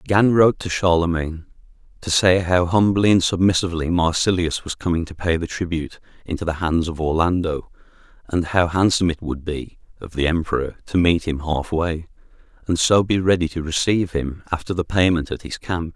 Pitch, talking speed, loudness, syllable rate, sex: 85 Hz, 180 wpm, -20 LUFS, 5.5 syllables/s, male